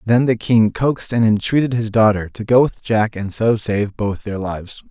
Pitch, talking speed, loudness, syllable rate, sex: 110 Hz, 220 wpm, -17 LUFS, 5.0 syllables/s, male